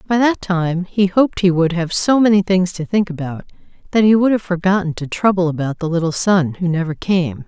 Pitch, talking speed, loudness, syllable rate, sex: 180 Hz, 225 wpm, -17 LUFS, 5.5 syllables/s, female